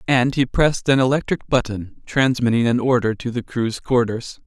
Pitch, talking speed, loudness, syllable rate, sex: 125 Hz, 175 wpm, -19 LUFS, 5.0 syllables/s, male